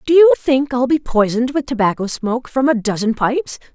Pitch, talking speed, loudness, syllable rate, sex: 255 Hz, 210 wpm, -16 LUFS, 5.8 syllables/s, female